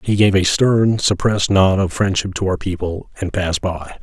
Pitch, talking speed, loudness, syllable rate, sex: 95 Hz, 210 wpm, -17 LUFS, 5.0 syllables/s, male